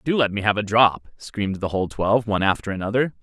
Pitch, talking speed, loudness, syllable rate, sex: 105 Hz, 240 wpm, -21 LUFS, 6.6 syllables/s, male